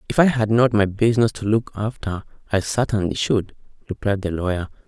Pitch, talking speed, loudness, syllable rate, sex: 105 Hz, 185 wpm, -21 LUFS, 5.6 syllables/s, male